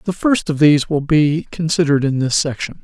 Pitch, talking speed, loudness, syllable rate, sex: 150 Hz, 210 wpm, -16 LUFS, 5.6 syllables/s, male